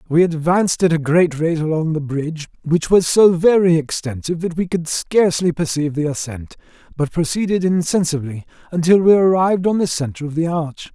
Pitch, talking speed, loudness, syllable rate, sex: 165 Hz, 180 wpm, -17 LUFS, 5.5 syllables/s, male